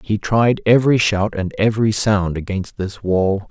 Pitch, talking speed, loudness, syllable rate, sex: 105 Hz, 170 wpm, -17 LUFS, 4.5 syllables/s, male